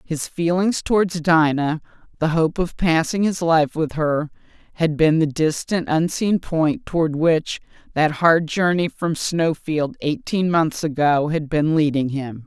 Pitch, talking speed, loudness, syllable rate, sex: 160 Hz, 155 wpm, -20 LUFS, 4.0 syllables/s, female